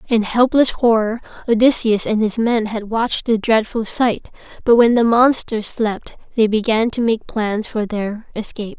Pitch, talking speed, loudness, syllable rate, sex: 225 Hz, 170 wpm, -17 LUFS, 4.5 syllables/s, female